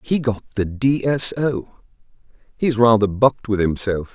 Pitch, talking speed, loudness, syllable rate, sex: 115 Hz, 160 wpm, -19 LUFS, 4.5 syllables/s, male